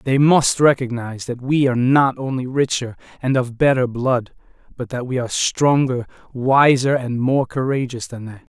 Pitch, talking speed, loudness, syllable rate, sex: 130 Hz, 170 wpm, -18 LUFS, 4.8 syllables/s, male